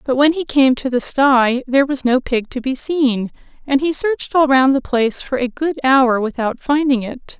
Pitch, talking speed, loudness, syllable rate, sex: 265 Hz, 225 wpm, -16 LUFS, 4.8 syllables/s, female